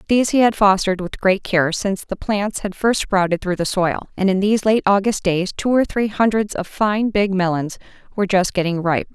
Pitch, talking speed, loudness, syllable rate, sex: 195 Hz, 225 wpm, -18 LUFS, 5.4 syllables/s, female